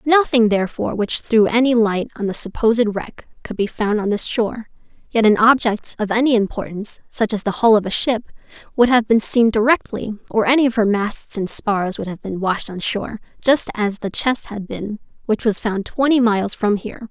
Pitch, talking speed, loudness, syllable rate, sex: 220 Hz, 210 wpm, -18 LUFS, 5.3 syllables/s, female